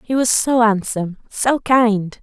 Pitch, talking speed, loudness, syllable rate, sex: 225 Hz, 160 wpm, -17 LUFS, 4.0 syllables/s, female